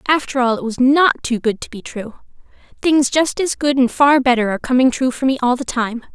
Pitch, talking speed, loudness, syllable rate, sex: 260 Hz, 245 wpm, -16 LUFS, 5.6 syllables/s, female